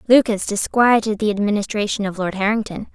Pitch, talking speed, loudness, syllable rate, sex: 210 Hz, 145 wpm, -19 LUFS, 5.8 syllables/s, female